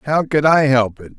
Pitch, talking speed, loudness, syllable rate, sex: 135 Hz, 255 wpm, -15 LUFS, 5.1 syllables/s, male